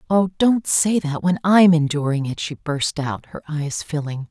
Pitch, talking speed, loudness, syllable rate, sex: 160 Hz, 195 wpm, -20 LUFS, 4.3 syllables/s, female